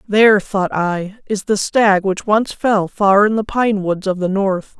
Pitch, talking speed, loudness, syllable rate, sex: 200 Hz, 215 wpm, -16 LUFS, 3.9 syllables/s, female